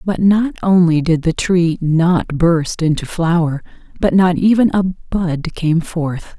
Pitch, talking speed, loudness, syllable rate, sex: 170 Hz, 160 wpm, -15 LUFS, 3.6 syllables/s, female